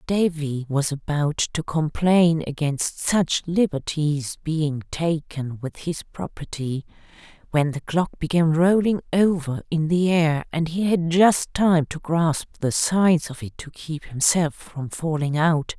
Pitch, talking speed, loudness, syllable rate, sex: 160 Hz, 150 wpm, -22 LUFS, 3.8 syllables/s, female